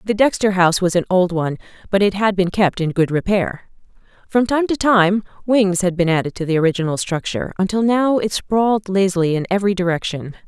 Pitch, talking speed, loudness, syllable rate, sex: 190 Hz, 200 wpm, -18 LUFS, 5.9 syllables/s, female